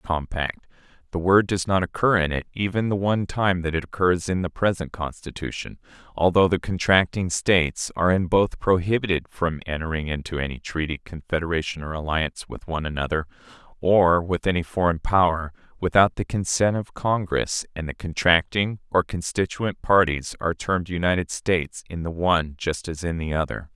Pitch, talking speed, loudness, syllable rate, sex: 85 Hz, 170 wpm, -23 LUFS, 5.4 syllables/s, male